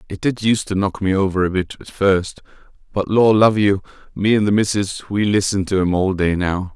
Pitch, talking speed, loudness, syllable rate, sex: 100 Hz, 230 wpm, -18 LUFS, 5.1 syllables/s, male